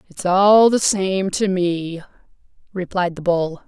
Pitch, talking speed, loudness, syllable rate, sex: 185 Hz, 145 wpm, -18 LUFS, 3.6 syllables/s, female